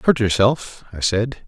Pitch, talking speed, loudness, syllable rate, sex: 115 Hz, 160 wpm, -19 LUFS, 3.7 syllables/s, male